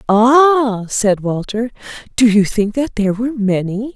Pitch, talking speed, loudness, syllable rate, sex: 225 Hz, 150 wpm, -15 LUFS, 4.2 syllables/s, female